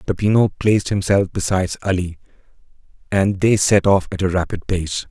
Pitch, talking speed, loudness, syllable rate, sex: 95 Hz, 155 wpm, -18 LUFS, 5.3 syllables/s, male